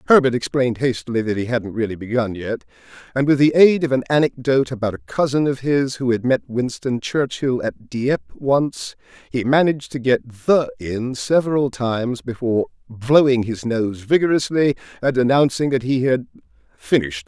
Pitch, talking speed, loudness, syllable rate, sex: 125 Hz, 165 wpm, -19 LUFS, 5.2 syllables/s, male